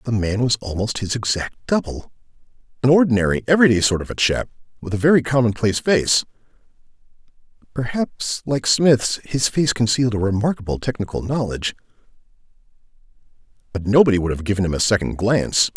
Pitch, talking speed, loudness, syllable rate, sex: 115 Hz, 145 wpm, -19 LUFS, 6.0 syllables/s, male